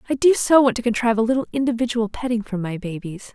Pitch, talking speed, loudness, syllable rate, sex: 235 Hz, 235 wpm, -20 LUFS, 6.8 syllables/s, female